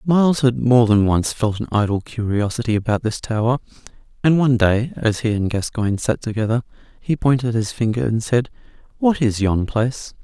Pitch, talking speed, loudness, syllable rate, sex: 115 Hz, 180 wpm, -19 LUFS, 5.4 syllables/s, male